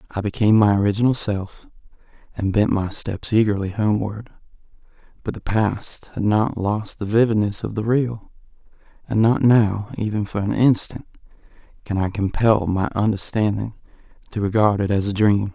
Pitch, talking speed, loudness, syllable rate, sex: 105 Hz, 145 wpm, -20 LUFS, 5.0 syllables/s, male